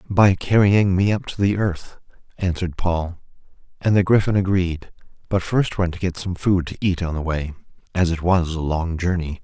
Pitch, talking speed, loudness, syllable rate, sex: 90 Hz, 195 wpm, -21 LUFS, 5.0 syllables/s, male